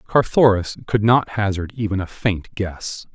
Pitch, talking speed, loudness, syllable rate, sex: 100 Hz, 150 wpm, -20 LUFS, 4.3 syllables/s, male